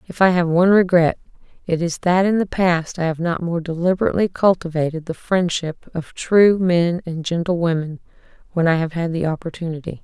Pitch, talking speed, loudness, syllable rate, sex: 170 Hz, 185 wpm, -19 LUFS, 5.5 syllables/s, female